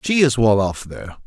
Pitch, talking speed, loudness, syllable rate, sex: 120 Hz, 235 wpm, -17 LUFS, 5.4 syllables/s, male